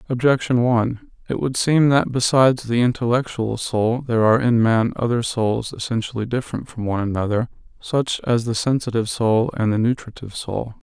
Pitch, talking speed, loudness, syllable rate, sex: 120 Hz, 165 wpm, -20 LUFS, 5.5 syllables/s, male